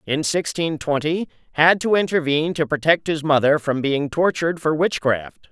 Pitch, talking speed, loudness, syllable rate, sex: 155 Hz, 165 wpm, -20 LUFS, 4.9 syllables/s, male